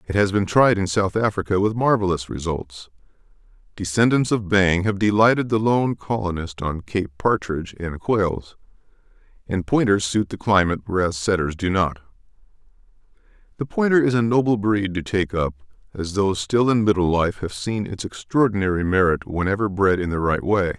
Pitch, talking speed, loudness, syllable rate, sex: 100 Hz, 165 wpm, -21 LUFS, 5.2 syllables/s, male